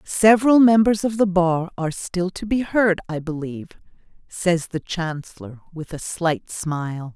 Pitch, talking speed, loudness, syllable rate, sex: 180 Hz, 160 wpm, -20 LUFS, 4.5 syllables/s, female